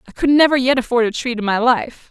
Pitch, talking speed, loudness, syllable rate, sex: 240 Hz, 285 wpm, -16 LUFS, 6.2 syllables/s, female